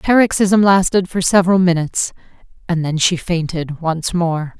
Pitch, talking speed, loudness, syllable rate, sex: 175 Hz, 155 wpm, -16 LUFS, 5.0 syllables/s, female